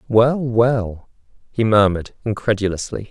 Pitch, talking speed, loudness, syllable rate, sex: 110 Hz, 95 wpm, -18 LUFS, 4.5 syllables/s, male